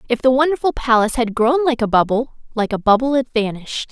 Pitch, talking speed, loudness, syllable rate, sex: 240 Hz, 215 wpm, -17 LUFS, 6.3 syllables/s, female